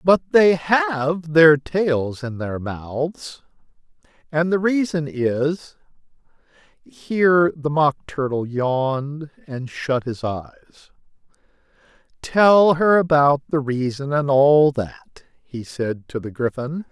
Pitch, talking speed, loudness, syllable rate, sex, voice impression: 150 Hz, 115 wpm, -19 LUFS, 3.0 syllables/s, male, masculine, adult-like, slightly clear, slightly cool, unique, slightly kind